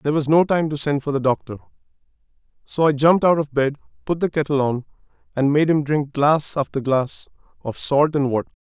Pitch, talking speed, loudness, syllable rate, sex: 145 Hz, 210 wpm, -20 LUFS, 5.8 syllables/s, male